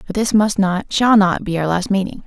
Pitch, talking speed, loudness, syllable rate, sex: 195 Hz, 240 wpm, -16 LUFS, 5.2 syllables/s, female